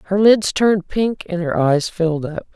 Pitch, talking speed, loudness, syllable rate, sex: 185 Hz, 210 wpm, -17 LUFS, 4.8 syllables/s, female